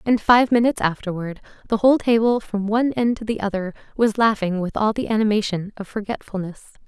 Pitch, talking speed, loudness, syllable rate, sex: 215 Hz, 185 wpm, -20 LUFS, 5.9 syllables/s, female